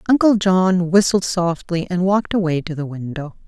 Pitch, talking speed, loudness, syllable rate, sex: 180 Hz, 175 wpm, -18 LUFS, 4.9 syllables/s, female